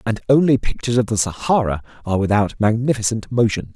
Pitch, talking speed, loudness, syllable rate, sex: 115 Hz, 160 wpm, -19 LUFS, 6.3 syllables/s, male